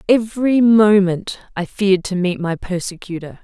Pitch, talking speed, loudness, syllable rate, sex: 195 Hz, 140 wpm, -17 LUFS, 4.8 syllables/s, female